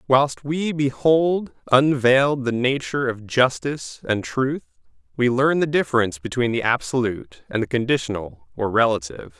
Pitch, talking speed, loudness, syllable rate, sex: 125 Hz, 140 wpm, -21 LUFS, 5.0 syllables/s, male